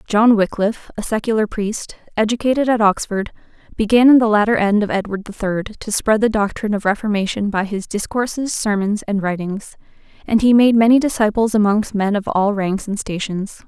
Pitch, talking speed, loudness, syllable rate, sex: 210 Hz, 180 wpm, -17 LUFS, 5.4 syllables/s, female